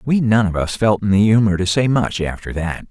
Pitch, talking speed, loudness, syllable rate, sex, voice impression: 105 Hz, 270 wpm, -17 LUFS, 5.4 syllables/s, male, masculine, adult-like, slightly thick, friendly, slightly unique